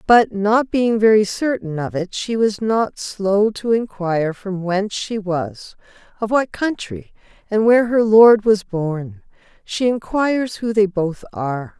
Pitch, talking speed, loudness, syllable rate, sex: 205 Hz, 165 wpm, -18 LUFS, 4.1 syllables/s, female